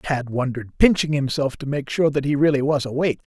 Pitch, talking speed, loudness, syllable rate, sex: 140 Hz, 215 wpm, -21 LUFS, 6.0 syllables/s, male